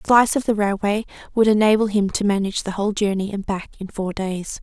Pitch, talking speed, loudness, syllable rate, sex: 205 Hz, 235 wpm, -20 LUFS, 6.3 syllables/s, female